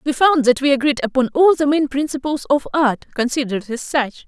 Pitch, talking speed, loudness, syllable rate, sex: 275 Hz, 210 wpm, -18 LUFS, 5.8 syllables/s, female